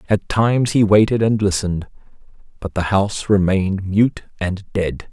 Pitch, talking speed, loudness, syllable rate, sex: 100 Hz, 150 wpm, -18 LUFS, 5.1 syllables/s, male